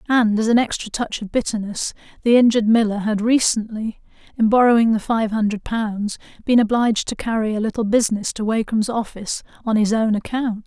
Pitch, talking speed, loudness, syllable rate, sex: 220 Hz, 180 wpm, -19 LUFS, 5.6 syllables/s, female